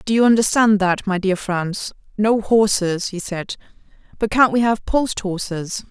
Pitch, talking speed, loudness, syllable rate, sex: 205 Hz, 165 wpm, -19 LUFS, 4.3 syllables/s, female